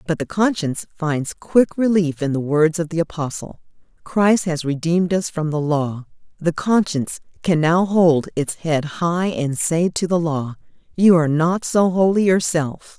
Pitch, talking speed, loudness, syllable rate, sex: 165 Hz, 175 wpm, -19 LUFS, 4.4 syllables/s, female